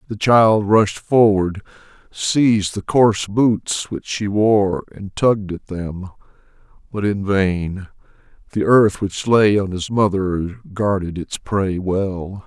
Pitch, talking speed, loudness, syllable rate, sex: 100 Hz, 140 wpm, -18 LUFS, 3.5 syllables/s, male